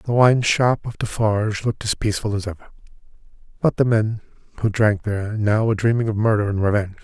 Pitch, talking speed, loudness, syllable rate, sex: 110 Hz, 195 wpm, -20 LUFS, 6.3 syllables/s, male